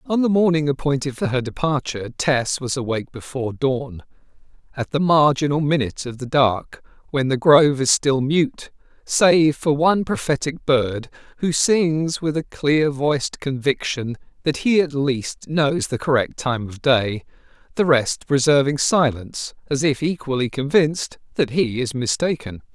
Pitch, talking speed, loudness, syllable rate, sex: 140 Hz, 155 wpm, -20 LUFS, 4.6 syllables/s, male